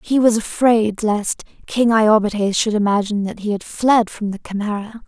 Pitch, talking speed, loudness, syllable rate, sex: 215 Hz, 175 wpm, -18 LUFS, 5.1 syllables/s, female